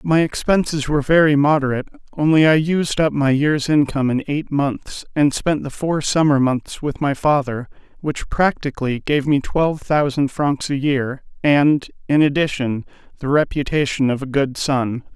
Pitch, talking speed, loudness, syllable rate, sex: 145 Hz, 165 wpm, -18 LUFS, 4.7 syllables/s, male